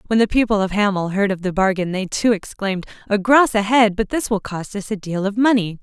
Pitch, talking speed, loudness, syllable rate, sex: 205 Hz, 260 wpm, -19 LUFS, 5.7 syllables/s, female